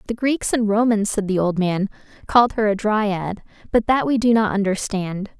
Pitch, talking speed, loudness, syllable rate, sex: 210 Hz, 200 wpm, -20 LUFS, 4.9 syllables/s, female